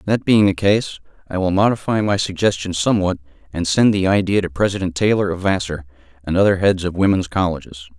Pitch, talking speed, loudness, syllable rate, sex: 95 Hz, 190 wpm, -18 LUFS, 6.0 syllables/s, male